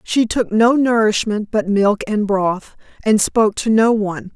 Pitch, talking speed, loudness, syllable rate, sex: 215 Hz, 180 wpm, -16 LUFS, 4.3 syllables/s, female